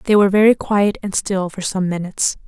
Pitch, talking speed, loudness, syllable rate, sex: 195 Hz, 220 wpm, -17 LUFS, 5.9 syllables/s, female